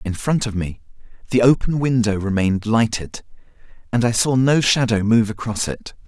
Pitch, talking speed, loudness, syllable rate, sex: 115 Hz, 170 wpm, -19 LUFS, 5.1 syllables/s, male